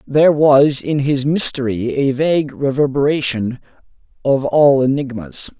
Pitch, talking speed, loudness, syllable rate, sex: 135 Hz, 120 wpm, -16 LUFS, 4.4 syllables/s, male